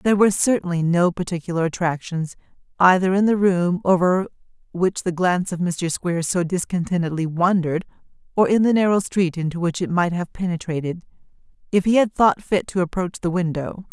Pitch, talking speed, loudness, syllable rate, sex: 180 Hz, 170 wpm, -21 LUFS, 5.6 syllables/s, female